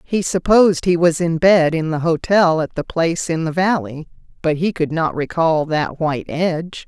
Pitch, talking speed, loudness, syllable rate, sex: 165 Hz, 190 wpm, -17 LUFS, 4.8 syllables/s, female